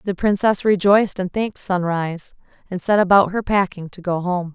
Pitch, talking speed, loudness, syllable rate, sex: 190 Hz, 185 wpm, -19 LUFS, 5.4 syllables/s, female